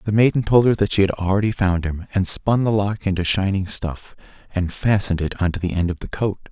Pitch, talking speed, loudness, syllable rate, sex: 95 Hz, 250 wpm, -20 LUFS, 5.7 syllables/s, male